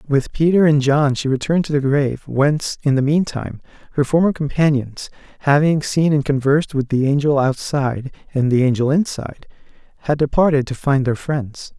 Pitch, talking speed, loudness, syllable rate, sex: 140 Hz, 180 wpm, -18 LUFS, 5.4 syllables/s, male